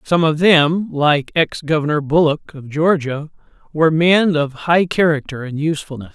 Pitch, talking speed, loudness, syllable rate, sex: 155 Hz, 155 wpm, -16 LUFS, 4.7 syllables/s, male